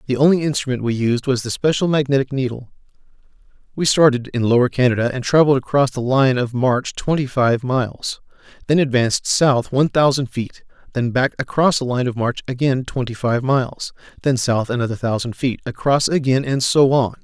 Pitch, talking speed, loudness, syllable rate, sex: 130 Hz, 180 wpm, -18 LUFS, 5.5 syllables/s, male